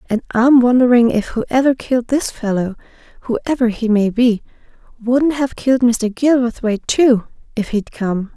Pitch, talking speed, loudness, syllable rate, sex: 240 Hz, 150 wpm, -16 LUFS, 4.7 syllables/s, female